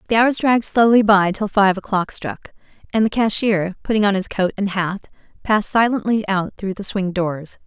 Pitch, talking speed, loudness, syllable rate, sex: 200 Hz, 195 wpm, -18 LUFS, 5.2 syllables/s, female